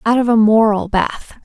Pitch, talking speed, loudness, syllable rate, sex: 220 Hz, 210 wpm, -14 LUFS, 4.7 syllables/s, female